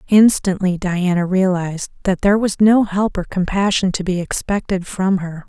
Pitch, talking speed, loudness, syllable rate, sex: 190 Hz, 165 wpm, -17 LUFS, 4.8 syllables/s, female